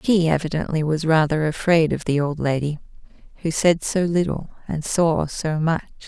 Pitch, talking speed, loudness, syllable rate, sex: 160 Hz, 170 wpm, -21 LUFS, 4.7 syllables/s, female